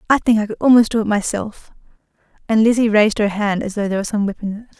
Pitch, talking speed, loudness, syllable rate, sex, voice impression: 215 Hz, 265 wpm, -17 LUFS, 7.6 syllables/s, female, feminine, adult-like, sincere, slightly friendly